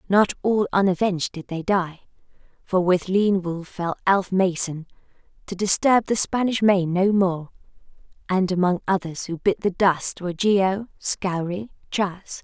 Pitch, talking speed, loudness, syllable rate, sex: 190 Hz, 150 wpm, -22 LUFS, 4.3 syllables/s, female